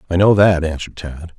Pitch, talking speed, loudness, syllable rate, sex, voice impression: 85 Hz, 215 wpm, -15 LUFS, 6.2 syllables/s, male, masculine, adult-like, thick, cool, slightly calm